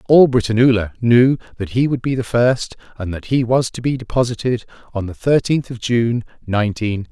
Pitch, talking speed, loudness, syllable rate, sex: 120 Hz, 195 wpm, -18 LUFS, 5.5 syllables/s, male